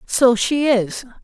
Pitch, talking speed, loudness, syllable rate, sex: 245 Hz, 145 wpm, -17 LUFS, 3.1 syllables/s, female